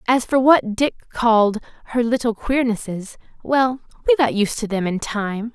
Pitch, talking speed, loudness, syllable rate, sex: 235 Hz, 160 wpm, -19 LUFS, 4.6 syllables/s, female